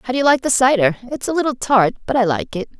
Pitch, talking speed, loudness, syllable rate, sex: 235 Hz, 280 wpm, -17 LUFS, 6.3 syllables/s, female